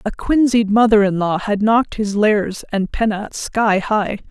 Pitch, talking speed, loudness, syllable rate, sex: 210 Hz, 180 wpm, -17 LUFS, 4.8 syllables/s, female